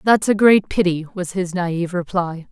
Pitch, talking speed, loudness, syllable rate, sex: 185 Hz, 190 wpm, -18 LUFS, 4.8 syllables/s, female